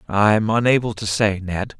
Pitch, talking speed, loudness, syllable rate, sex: 105 Hz, 165 wpm, -19 LUFS, 4.5 syllables/s, male